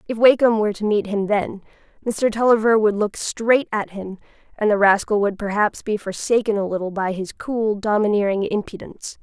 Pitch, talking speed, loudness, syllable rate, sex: 210 Hz, 180 wpm, -20 LUFS, 5.3 syllables/s, female